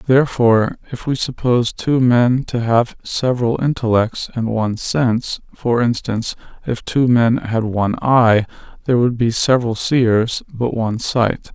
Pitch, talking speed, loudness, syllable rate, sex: 120 Hz, 140 wpm, -17 LUFS, 4.6 syllables/s, male